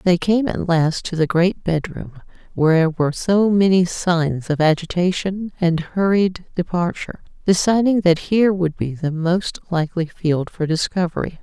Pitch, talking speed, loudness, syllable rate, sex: 175 Hz, 150 wpm, -19 LUFS, 4.6 syllables/s, female